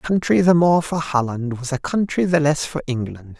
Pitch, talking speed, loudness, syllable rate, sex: 150 Hz, 230 wpm, -19 LUFS, 5.3 syllables/s, male